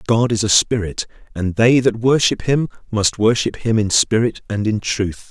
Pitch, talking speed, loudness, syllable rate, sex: 110 Hz, 190 wpm, -17 LUFS, 4.6 syllables/s, male